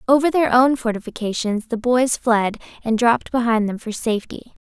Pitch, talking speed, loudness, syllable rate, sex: 235 Hz, 165 wpm, -19 LUFS, 5.3 syllables/s, female